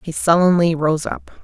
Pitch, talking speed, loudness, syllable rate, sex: 165 Hz, 165 wpm, -16 LUFS, 4.5 syllables/s, female